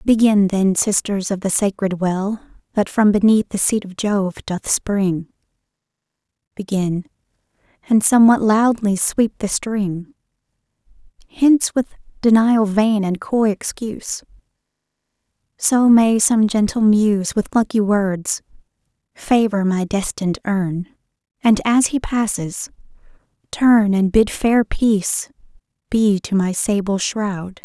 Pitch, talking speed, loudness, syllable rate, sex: 205 Hz, 120 wpm, -18 LUFS, 3.9 syllables/s, female